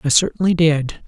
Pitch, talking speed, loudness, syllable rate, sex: 165 Hz, 170 wpm, -17 LUFS, 5.2 syllables/s, male